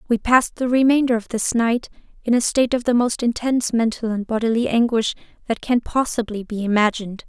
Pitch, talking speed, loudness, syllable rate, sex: 235 Hz, 190 wpm, -20 LUFS, 5.9 syllables/s, female